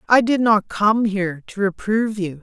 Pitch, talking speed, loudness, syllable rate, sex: 205 Hz, 200 wpm, -19 LUFS, 5.0 syllables/s, female